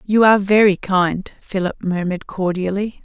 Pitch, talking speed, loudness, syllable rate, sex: 190 Hz, 140 wpm, -17 LUFS, 5.0 syllables/s, female